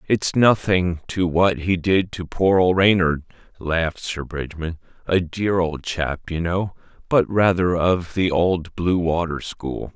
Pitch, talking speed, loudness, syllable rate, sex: 90 Hz, 165 wpm, -21 LUFS, 3.8 syllables/s, male